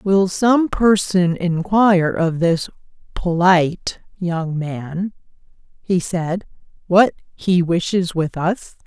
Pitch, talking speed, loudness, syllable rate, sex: 180 Hz, 110 wpm, -18 LUFS, 3.2 syllables/s, female